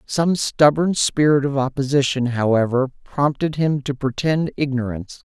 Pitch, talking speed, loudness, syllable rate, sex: 140 Hz, 125 wpm, -19 LUFS, 4.7 syllables/s, male